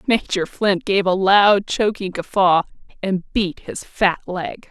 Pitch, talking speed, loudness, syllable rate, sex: 190 Hz, 155 wpm, -19 LUFS, 3.6 syllables/s, female